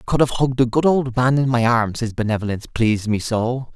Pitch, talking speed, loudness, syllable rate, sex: 120 Hz, 255 wpm, -19 LUFS, 6.2 syllables/s, male